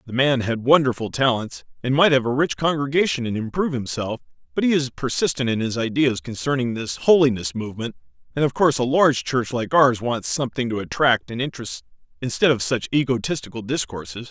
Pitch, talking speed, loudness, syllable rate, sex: 125 Hz, 185 wpm, -21 LUFS, 5.9 syllables/s, male